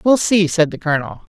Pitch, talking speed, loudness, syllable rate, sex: 180 Hz, 220 wpm, -16 LUFS, 5.9 syllables/s, female